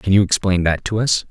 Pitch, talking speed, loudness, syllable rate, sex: 95 Hz, 275 wpm, -17 LUFS, 5.6 syllables/s, male